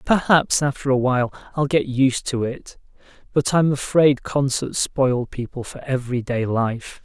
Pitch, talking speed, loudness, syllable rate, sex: 130 Hz, 155 wpm, -21 LUFS, 4.4 syllables/s, male